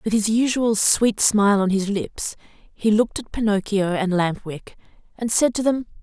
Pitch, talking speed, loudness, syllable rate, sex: 210 Hz, 190 wpm, -20 LUFS, 4.6 syllables/s, female